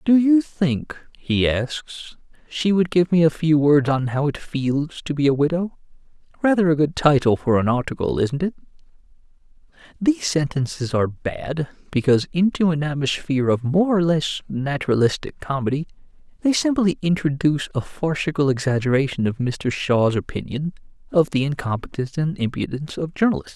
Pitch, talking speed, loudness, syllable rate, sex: 150 Hz, 155 wpm, -21 LUFS, 5.2 syllables/s, male